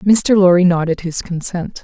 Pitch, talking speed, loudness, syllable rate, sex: 180 Hz, 165 wpm, -15 LUFS, 4.5 syllables/s, female